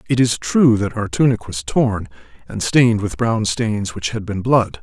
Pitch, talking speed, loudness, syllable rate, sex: 110 Hz, 210 wpm, -18 LUFS, 4.5 syllables/s, male